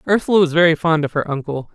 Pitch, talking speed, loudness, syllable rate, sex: 160 Hz, 240 wpm, -17 LUFS, 7.0 syllables/s, male